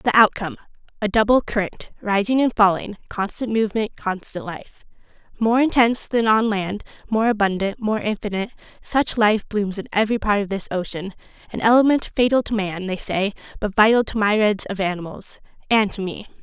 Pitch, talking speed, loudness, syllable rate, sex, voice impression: 210 Hz, 165 wpm, -20 LUFS, 5.5 syllables/s, female, very feminine, young, very thin, slightly relaxed, slightly weak, bright, hard, very clear, very fluent, slightly raspy, very cute, intellectual, very refreshing, sincere, slightly calm, very friendly, very reassuring, very unique, slightly elegant, slightly wild, sweet, very lively, kind, intense, slightly sharp